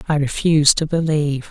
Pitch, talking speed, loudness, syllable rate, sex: 150 Hz, 160 wpm, -17 LUFS, 6.0 syllables/s, male